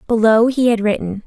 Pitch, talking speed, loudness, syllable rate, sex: 220 Hz, 190 wpm, -15 LUFS, 5.4 syllables/s, female